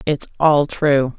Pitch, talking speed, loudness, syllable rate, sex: 145 Hz, 150 wpm, -17 LUFS, 3.2 syllables/s, female